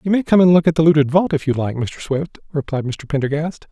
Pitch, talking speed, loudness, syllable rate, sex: 155 Hz, 275 wpm, -17 LUFS, 6.0 syllables/s, male